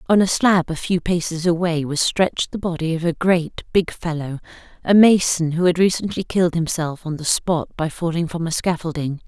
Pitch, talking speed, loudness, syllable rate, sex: 170 Hz, 200 wpm, -20 LUFS, 5.2 syllables/s, female